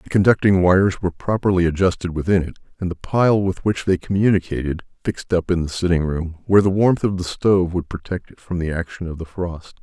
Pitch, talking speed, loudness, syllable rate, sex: 90 Hz, 220 wpm, -20 LUFS, 6.0 syllables/s, male